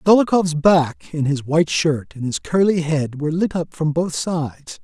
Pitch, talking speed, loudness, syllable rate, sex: 160 Hz, 200 wpm, -19 LUFS, 4.6 syllables/s, male